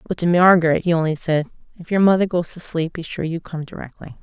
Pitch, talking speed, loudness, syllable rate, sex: 170 Hz, 240 wpm, -19 LUFS, 6.2 syllables/s, female